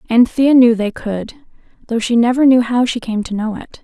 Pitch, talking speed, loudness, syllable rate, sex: 235 Hz, 220 wpm, -15 LUFS, 5.1 syllables/s, female